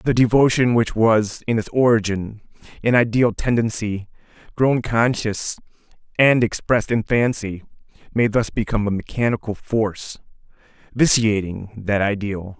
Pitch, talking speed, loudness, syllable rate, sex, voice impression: 110 Hz, 120 wpm, -20 LUFS, 4.6 syllables/s, male, masculine, adult-like, slightly thick, tensed, powerful, bright, muffled, cool, intellectual, calm, slightly reassuring, wild, slightly modest